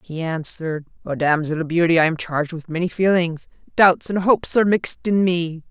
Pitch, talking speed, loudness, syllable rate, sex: 170 Hz, 200 wpm, -20 LUFS, 5.7 syllables/s, female